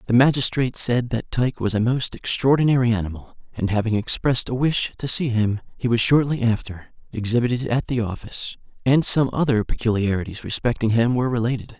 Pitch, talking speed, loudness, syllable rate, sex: 120 Hz, 175 wpm, -21 LUFS, 6.0 syllables/s, male